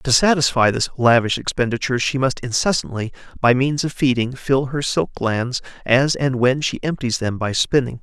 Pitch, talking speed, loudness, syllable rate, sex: 130 Hz, 180 wpm, -19 LUFS, 5.0 syllables/s, male